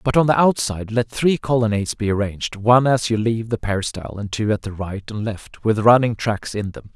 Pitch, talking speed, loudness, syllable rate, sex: 110 Hz, 235 wpm, -20 LUFS, 5.9 syllables/s, male